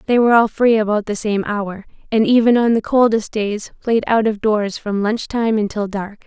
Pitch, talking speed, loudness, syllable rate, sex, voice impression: 215 Hz, 220 wpm, -17 LUFS, 4.9 syllables/s, female, feminine, adult-like, slightly powerful, bright, soft, fluent, slightly cute, calm, friendly, reassuring, elegant, slightly lively, kind, slightly modest